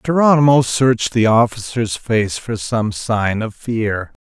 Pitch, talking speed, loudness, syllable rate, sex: 120 Hz, 140 wpm, -17 LUFS, 4.0 syllables/s, male